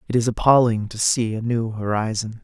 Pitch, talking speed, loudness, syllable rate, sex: 115 Hz, 195 wpm, -20 LUFS, 5.3 syllables/s, male